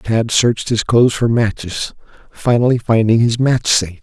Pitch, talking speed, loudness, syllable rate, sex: 115 Hz, 165 wpm, -15 LUFS, 5.0 syllables/s, male